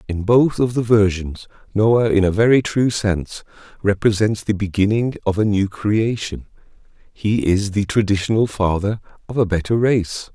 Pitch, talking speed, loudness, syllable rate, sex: 105 Hz, 155 wpm, -18 LUFS, 4.7 syllables/s, male